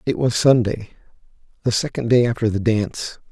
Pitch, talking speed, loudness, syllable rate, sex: 115 Hz, 165 wpm, -19 LUFS, 5.5 syllables/s, male